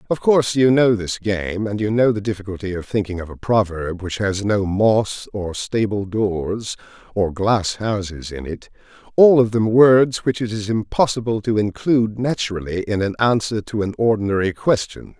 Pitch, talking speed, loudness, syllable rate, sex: 105 Hz, 180 wpm, -19 LUFS, 4.8 syllables/s, male